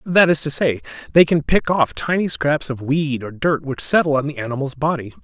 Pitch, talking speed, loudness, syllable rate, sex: 145 Hz, 230 wpm, -19 LUFS, 5.3 syllables/s, male